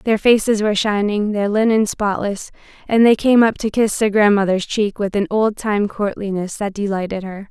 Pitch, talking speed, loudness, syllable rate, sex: 205 Hz, 190 wpm, -17 LUFS, 5.0 syllables/s, female